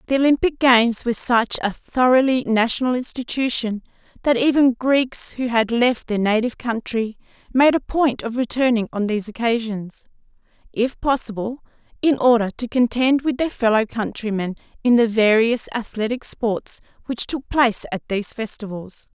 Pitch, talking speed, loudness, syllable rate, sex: 235 Hz, 145 wpm, -20 LUFS, 5.0 syllables/s, female